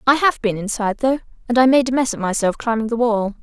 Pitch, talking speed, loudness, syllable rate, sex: 235 Hz, 265 wpm, -18 LUFS, 6.4 syllables/s, female